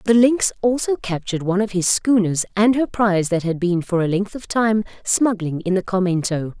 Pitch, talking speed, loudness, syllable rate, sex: 200 Hz, 210 wpm, -19 LUFS, 5.4 syllables/s, female